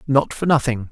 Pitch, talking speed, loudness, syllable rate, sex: 135 Hz, 195 wpm, -19 LUFS, 5.2 syllables/s, male